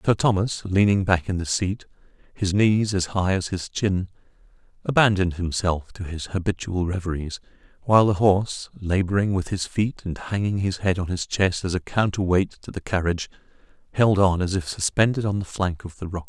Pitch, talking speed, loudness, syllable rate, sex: 95 Hz, 190 wpm, -23 LUFS, 5.3 syllables/s, male